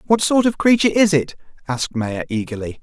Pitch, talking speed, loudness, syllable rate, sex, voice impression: 165 Hz, 190 wpm, -18 LUFS, 6.1 syllables/s, male, masculine, slightly young, adult-like, slightly thick, tensed, slightly powerful, very bright, slightly hard, very clear, very fluent, slightly cool, very intellectual, slightly refreshing, sincere, slightly calm, slightly friendly, slightly reassuring, wild, slightly sweet, slightly lively, slightly strict